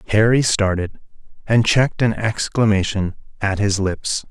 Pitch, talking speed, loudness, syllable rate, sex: 105 Hz, 125 wpm, -18 LUFS, 4.5 syllables/s, male